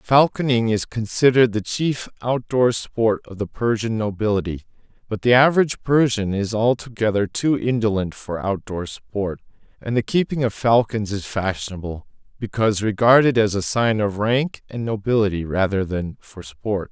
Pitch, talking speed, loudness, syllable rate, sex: 110 Hz, 155 wpm, -20 LUFS, 4.9 syllables/s, male